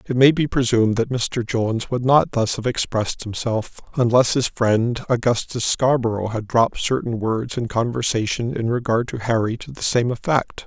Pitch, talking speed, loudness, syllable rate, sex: 120 Hz, 180 wpm, -20 LUFS, 4.9 syllables/s, male